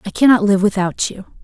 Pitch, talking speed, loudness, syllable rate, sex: 200 Hz, 210 wpm, -15 LUFS, 5.5 syllables/s, female